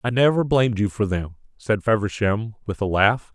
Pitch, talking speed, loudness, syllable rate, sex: 110 Hz, 195 wpm, -21 LUFS, 5.1 syllables/s, male